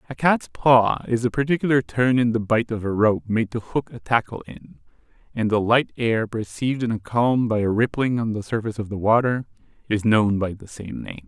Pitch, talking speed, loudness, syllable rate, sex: 115 Hz, 225 wpm, -22 LUFS, 5.2 syllables/s, male